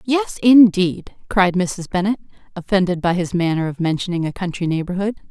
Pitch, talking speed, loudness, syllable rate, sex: 185 Hz, 160 wpm, -18 LUFS, 5.3 syllables/s, female